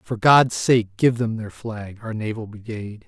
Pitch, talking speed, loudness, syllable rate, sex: 110 Hz, 195 wpm, -21 LUFS, 4.5 syllables/s, male